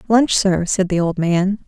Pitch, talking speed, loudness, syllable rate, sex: 190 Hz, 215 wpm, -17 LUFS, 4.2 syllables/s, female